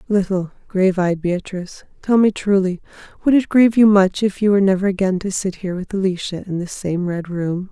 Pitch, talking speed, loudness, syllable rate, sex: 190 Hz, 210 wpm, -18 LUFS, 5.8 syllables/s, female